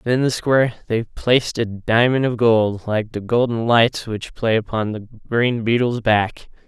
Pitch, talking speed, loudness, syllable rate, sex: 115 Hz, 180 wpm, -19 LUFS, 4.4 syllables/s, male